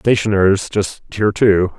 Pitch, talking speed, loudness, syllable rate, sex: 100 Hz, 135 wpm, -16 LUFS, 4.4 syllables/s, male